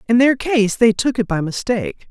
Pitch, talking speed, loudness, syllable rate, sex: 230 Hz, 230 wpm, -17 LUFS, 5.2 syllables/s, female